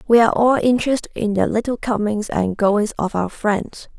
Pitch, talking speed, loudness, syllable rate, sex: 220 Hz, 195 wpm, -19 LUFS, 5.1 syllables/s, female